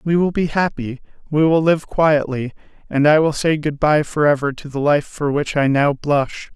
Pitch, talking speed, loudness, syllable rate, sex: 150 Hz, 210 wpm, -18 LUFS, 4.7 syllables/s, male